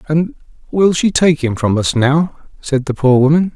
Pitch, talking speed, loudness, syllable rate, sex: 150 Hz, 200 wpm, -14 LUFS, 4.6 syllables/s, male